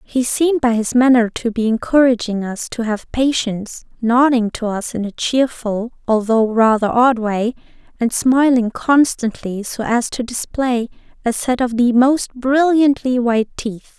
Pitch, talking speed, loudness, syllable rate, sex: 240 Hz, 160 wpm, -17 LUFS, 4.3 syllables/s, female